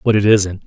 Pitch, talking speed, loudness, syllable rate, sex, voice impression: 100 Hz, 270 wpm, -14 LUFS, 5.5 syllables/s, male, masculine, adult-like, tensed, powerful, bright, clear, slightly fluent, cool, intellectual, friendly, slightly reassuring, slightly wild, kind